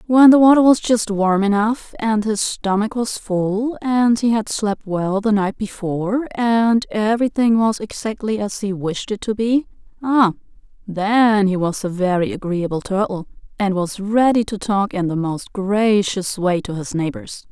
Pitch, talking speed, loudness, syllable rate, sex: 210 Hz, 170 wpm, -18 LUFS, 4.3 syllables/s, female